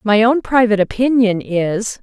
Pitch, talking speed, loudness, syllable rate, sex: 220 Hz, 150 wpm, -15 LUFS, 4.7 syllables/s, female